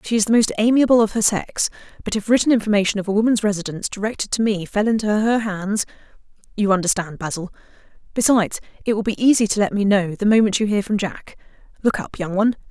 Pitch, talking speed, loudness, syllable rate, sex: 210 Hz, 210 wpm, -19 LUFS, 6.6 syllables/s, female